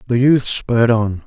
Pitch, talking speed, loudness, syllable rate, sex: 115 Hz, 190 wpm, -15 LUFS, 4.7 syllables/s, male